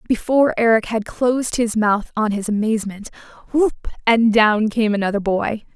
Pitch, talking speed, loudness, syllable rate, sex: 220 Hz, 155 wpm, -18 LUFS, 5.0 syllables/s, female